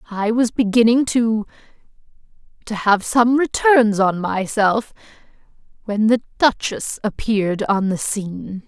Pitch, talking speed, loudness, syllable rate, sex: 220 Hz, 110 wpm, -18 LUFS, 4.1 syllables/s, female